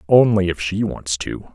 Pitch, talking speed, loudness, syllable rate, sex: 90 Hz, 195 wpm, -19 LUFS, 4.7 syllables/s, male